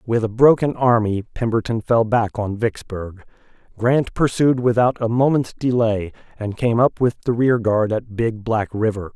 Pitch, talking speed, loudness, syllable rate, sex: 115 Hz, 170 wpm, -19 LUFS, 4.4 syllables/s, male